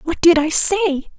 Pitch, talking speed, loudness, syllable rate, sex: 335 Hz, 200 wpm, -15 LUFS, 5.5 syllables/s, female